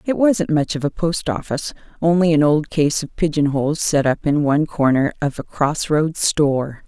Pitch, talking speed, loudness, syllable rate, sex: 155 Hz, 210 wpm, -18 LUFS, 5.0 syllables/s, female